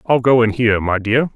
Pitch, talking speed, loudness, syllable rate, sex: 115 Hz, 265 wpm, -15 LUFS, 5.8 syllables/s, male